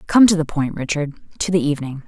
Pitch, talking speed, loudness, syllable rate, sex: 160 Hz, 205 wpm, -19 LUFS, 6.6 syllables/s, female